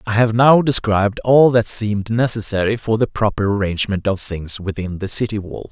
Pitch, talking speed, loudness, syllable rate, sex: 105 Hz, 190 wpm, -17 LUFS, 5.4 syllables/s, male